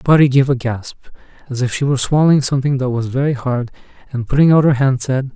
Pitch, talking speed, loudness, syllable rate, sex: 135 Hz, 225 wpm, -16 LUFS, 6.8 syllables/s, male